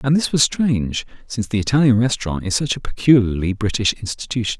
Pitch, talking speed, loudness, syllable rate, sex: 115 Hz, 185 wpm, -19 LUFS, 6.3 syllables/s, male